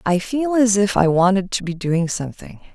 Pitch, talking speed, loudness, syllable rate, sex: 195 Hz, 220 wpm, -18 LUFS, 5.1 syllables/s, female